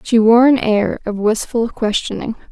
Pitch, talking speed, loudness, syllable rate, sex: 225 Hz, 165 wpm, -15 LUFS, 4.4 syllables/s, female